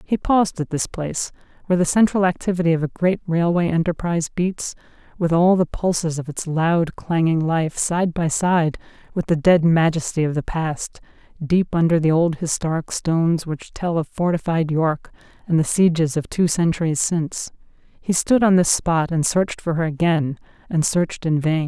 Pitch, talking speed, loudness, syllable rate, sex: 165 Hz, 175 wpm, -20 LUFS, 4.9 syllables/s, female